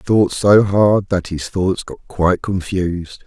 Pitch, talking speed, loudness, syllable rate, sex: 95 Hz, 185 wpm, -17 LUFS, 4.2 syllables/s, male